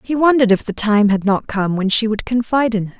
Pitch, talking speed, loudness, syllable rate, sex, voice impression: 220 Hz, 280 wpm, -16 LUFS, 6.3 syllables/s, female, very feminine, slightly young, very thin, very tensed, slightly powerful, bright, slightly soft, clear, very fluent, slightly raspy, slightly cute, cool, intellectual, very refreshing, sincere, calm, friendly, very reassuring, unique, elegant, slightly wild, slightly sweet, lively, strict, slightly intense, slightly sharp, light